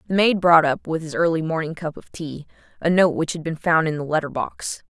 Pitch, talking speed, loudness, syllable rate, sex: 160 Hz, 255 wpm, -21 LUFS, 5.6 syllables/s, female